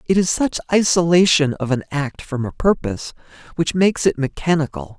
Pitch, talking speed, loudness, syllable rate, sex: 155 Hz, 170 wpm, -18 LUFS, 5.4 syllables/s, male